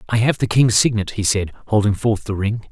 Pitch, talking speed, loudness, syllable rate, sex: 105 Hz, 245 wpm, -18 LUFS, 5.5 syllables/s, male